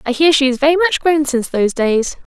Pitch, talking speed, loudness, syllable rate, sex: 285 Hz, 260 wpm, -14 LUFS, 6.3 syllables/s, female